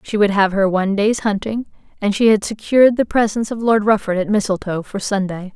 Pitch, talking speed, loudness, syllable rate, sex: 205 Hz, 215 wpm, -17 LUFS, 5.8 syllables/s, female